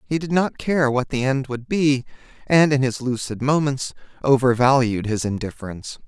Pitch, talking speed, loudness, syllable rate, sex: 130 Hz, 170 wpm, -20 LUFS, 5.0 syllables/s, male